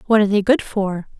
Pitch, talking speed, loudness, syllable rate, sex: 210 Hz, 250 wpm, -18 LUFS, 6.3 syllables/s, female